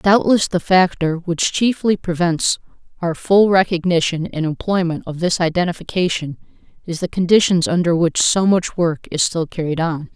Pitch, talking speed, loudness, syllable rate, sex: 175 Hz, 155 wpm, -17 LUFS, 4.8 syllables/s, female